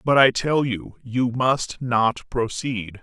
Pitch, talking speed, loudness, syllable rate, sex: 125 Hz, 160 wpm, -22 LUFS, 3.3 syllables/s, female